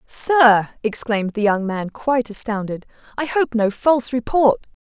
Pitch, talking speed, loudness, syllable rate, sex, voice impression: 235 Hz, 150 wpm, -19 LUFS, 4.7 syllables/s, female, feminine, adult-like, tensed, powerful, bright, clear, friendly, elegant, lively, intense, slightly sharp